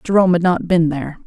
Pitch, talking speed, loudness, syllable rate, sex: 170 Hz, 235 wpm, -16 LUFS, 7.1 syllables/s, female